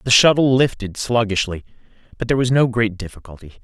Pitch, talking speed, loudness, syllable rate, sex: 115 Hz, 165 wpm, -17 LUFS, 6.1 syllables/s, male